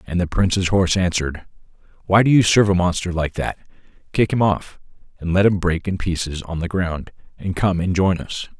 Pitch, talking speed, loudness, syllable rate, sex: 90 Hz, 210 wpm, -19 LUFS, 5.6 syllables/s, male